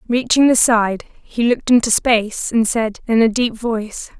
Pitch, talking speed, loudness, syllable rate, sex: 230 Hz, 185 wpm, -16 LUFS, 4.8 syllables/s, female